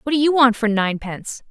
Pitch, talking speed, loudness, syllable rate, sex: 245 Hz, 240 wpm, -18 LUFS, 6.6 syllables/s, female